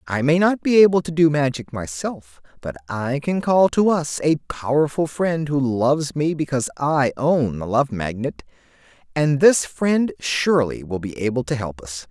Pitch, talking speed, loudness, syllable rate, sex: 140 Hz, 185 wpm, -20 LUFS, 4.6 syllables/s, male